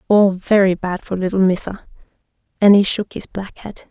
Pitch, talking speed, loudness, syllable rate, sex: 195 Hz, 185 wpm, -17 LUFS, 5.0 syllables/s, female